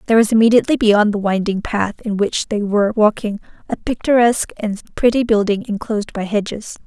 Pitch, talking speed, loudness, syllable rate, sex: 215 Hz, 175 wpm, -17 LUFS, 5.7 syllables/s, female